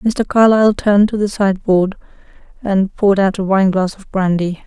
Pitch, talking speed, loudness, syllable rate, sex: 195 Hz, 165 wpm, -15 LUFS, 5.6 syllables/s, female